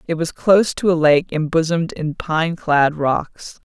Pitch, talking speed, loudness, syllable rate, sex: 160 Hz, 180 wpm, -18 LUFS, 4.3 syllables/s, female